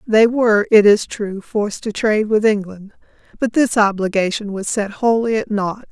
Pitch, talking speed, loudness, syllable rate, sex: 210 Hz, 185 wpm, -17 LUFS, 4.9 syllables/s, female